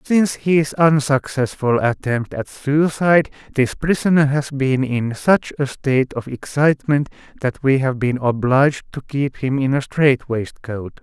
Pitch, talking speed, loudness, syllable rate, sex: 135 Hz, 150 wpm, -18 LUFS, 4.3 syllables/s, male